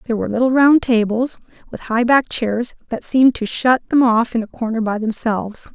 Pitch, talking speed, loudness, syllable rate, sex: 235 Hz, 210 wpm, -17 LUFS, 5.8 syllables/s, female